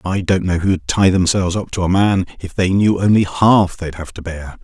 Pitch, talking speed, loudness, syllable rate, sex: 90 Hz, 245 wpm, -16 LUFS, 5.0 syllables/s, male